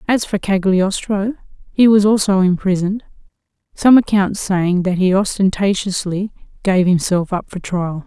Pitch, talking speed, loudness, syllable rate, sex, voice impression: 195 Hz, 135 wpm, -16 LUFS, 4.6 syllables/s, female, feminine, very adult-like, slightly muffled, intellectual, slightly calm, slightly elegant